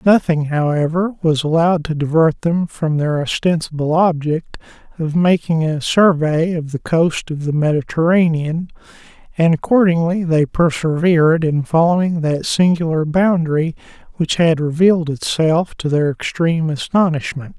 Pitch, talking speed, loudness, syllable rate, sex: 160 Hz, 130 wpm, -16 LUFS, 4.7 syllables/s, male